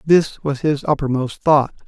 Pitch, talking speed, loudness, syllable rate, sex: 145 Hz, 160 wpm, -18 LUFS, 4.2 syllables/s, male